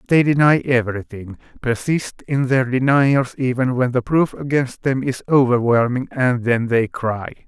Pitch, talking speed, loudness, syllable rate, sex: 125 Hz, 155 wpm, -18 LUFS, 4.4 syllables/s, male